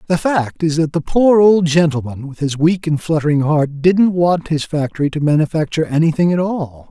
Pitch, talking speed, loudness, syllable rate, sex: 160 Hz, 200 wpm, -15 LUFS, 5.2 syllables/s, male